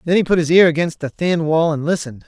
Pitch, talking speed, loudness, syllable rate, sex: 160 Hz, 290 wpm, -17 LUFS, 6.6 syllables/s, male